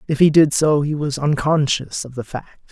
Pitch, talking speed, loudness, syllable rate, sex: 145 Hz, 220 wpm, -18 LUFS, 5.1 syllables/s, male